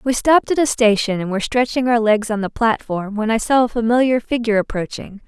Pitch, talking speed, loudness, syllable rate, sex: 230 Hz, 230 wpm, -18 LUFS, 6.0 syllables/s, female